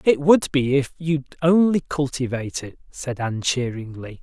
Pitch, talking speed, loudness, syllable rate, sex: 140 Hz, 155 wpm, -21 LUFS, 4.8 syllables/s, male